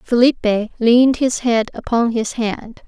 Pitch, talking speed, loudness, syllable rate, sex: 235 Hz, 145 wpm, -17 LUFS, 4.9 syllables/s, female